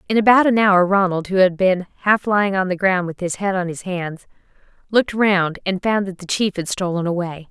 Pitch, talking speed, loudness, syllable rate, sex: 190 Hz, 230 wpm, -18 LUFS, 5.4 syllables/s, female